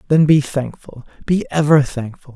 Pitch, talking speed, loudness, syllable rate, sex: 145 Hz, 125 wpm, -16 LUFS, 4.8 syllables/s, male